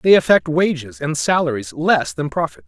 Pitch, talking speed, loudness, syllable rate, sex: 145 Hz, 180 wpm, -18 LUFS, 4.9 syllables/s, male